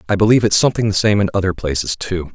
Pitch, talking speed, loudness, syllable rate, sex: 100 Hz, 255 wpm, -16 LUFS, 7.5 syllables/s, male